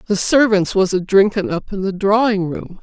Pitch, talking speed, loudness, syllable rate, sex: 195 Hz, 190 wpm, -16 LUFS, 4.9 syllables/s, female